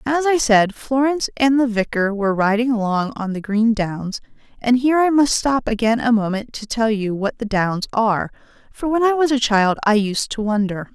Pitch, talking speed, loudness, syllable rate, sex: 230 Hz, 215 wpm, -19 LUFS, 5.1 syllables/s, female